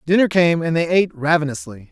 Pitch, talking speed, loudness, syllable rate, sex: 165 Hz, 190 wpm, -17 LUFS, 6.2 syllables/s, male